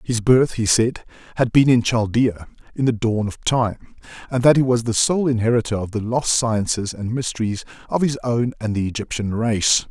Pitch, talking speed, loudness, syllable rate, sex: 115 Hz, 200 wpm, -20 LUFS, 4.9 syllables/s, male